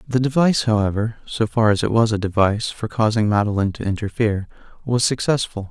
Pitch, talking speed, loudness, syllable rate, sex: 110 Hz, 180 wpm, -20 LUFS, 6.2 syllables/s, male